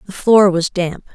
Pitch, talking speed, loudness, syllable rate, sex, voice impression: 185 Hz, 210 wpm, -15 LUFS, 4.3 syllables/s, female, very feminine, middle-aged, slightly thin, tensed, powerful, slightly dark, hard, clear, fluent, cool, intellectual, slightly refreshing, very sincere, very calm, friendly, very reassuring, slightly unique, very elegant, slightly wild, sweet, slightly lively, strict, slightly modest